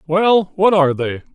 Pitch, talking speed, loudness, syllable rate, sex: 175 Hz, 180 wpm, -15 LUFS, 4.8 syllables/s, male